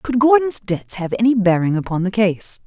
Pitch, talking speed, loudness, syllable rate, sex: 210 Hz, 205 wpm, -18 LUFS, 5.0 syllables/s, female